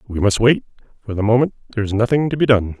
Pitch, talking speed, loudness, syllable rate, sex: 115 Hz, 255 wpm, -18 LUFS, 7.4 syllables/s, male